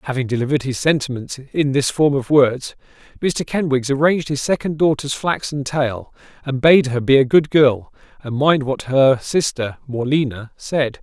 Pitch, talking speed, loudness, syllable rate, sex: 135 Hz, 170 wpm, -18 LUFS, 4.8 syllables/s, male